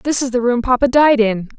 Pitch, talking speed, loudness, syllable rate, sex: 245 Hz, 265 wpm, -15 LUFS, 5.4 syllables/s, female